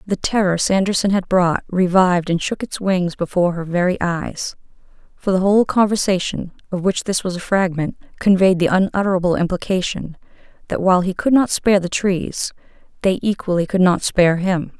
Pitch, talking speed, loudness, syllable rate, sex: 185 Hz, 170 wpm, -18 LUFS, 5.4 syllables/s, female